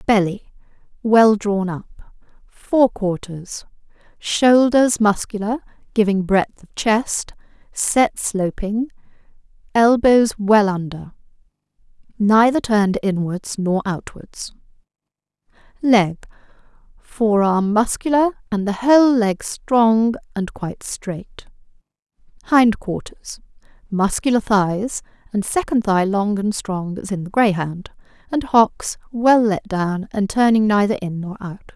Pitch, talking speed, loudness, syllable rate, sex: 210 Hz, 100 wpm, -18 LUFS, 3.7 syllables/s, female